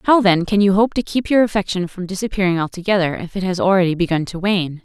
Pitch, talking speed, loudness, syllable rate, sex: 185 Hz, 235 wpm, -18 LUFS, 6.4 syllables/s, female